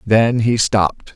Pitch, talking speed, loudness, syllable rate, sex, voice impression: 110 Hz, 155 wpm, -16 LUFS, 3.9 syllables/s, male, very masculine, slightly old, very thick, tensed, very powerful, bright, soft, muffled, fluent, raspy, cool, intellectual, slightly refreshing, sincere, calm, very mature, very friendly, very reassuring, very unique, slightly elegant, wild, sweet, lively, very kind, slightly modest